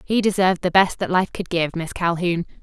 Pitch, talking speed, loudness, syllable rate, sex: 180 Hz, 230 wpm, -20 LUFS, 5.5 syllables/s, female